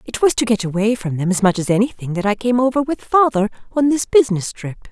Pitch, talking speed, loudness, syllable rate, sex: 220 Hz, 255 wpm, -17 LUFS, 6.3 syllables/s, female